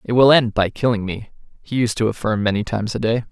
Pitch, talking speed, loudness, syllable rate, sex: 110 Hz, 255 wpm, -19 LUFS, 6.3 syllables/s, male